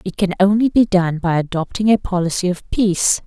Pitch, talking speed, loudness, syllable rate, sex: 190 Hz, 200 wpm, -17 LUFS, 5.5 syllables/s, female